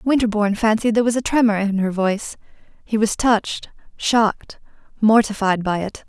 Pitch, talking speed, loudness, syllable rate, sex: 215 Hz, 160 wpm, -19 LUFS, 5.6 syllables/s, female